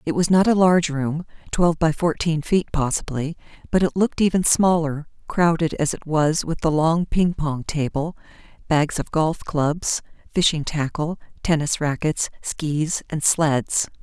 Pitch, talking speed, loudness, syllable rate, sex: 160 Hz, 150 wpm, -21 LUFS, 4.3 syllables/s, female